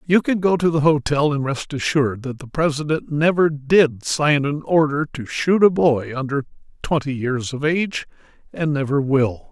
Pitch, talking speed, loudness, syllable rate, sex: 145 Hz, 185 wpm, -19 LUFS, 4.7 syllables/s, male